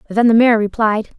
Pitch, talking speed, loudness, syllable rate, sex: 220 Hz, 200 wpm, -14 LUFS, 6.5 syllables/s, female